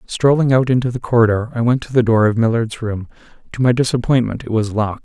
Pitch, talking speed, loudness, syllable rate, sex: 120 Hz, 225 wpm, -16 LUFS, 6.3 syllables/s, male